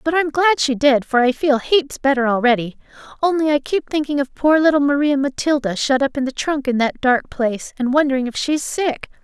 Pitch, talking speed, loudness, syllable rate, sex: 280 Hz, 220 wpm, -18 LUFS, 5.4 syllables/s, female